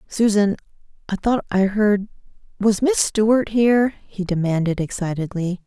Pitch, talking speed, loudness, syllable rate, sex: 205 Hz, 115 wpm, -20 LUFS, 4.6 syllables/s, female